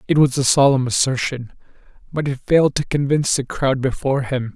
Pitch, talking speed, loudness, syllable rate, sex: 135 Hz, 185 wpm, -18 LUFS, 5.8 syllables/s, male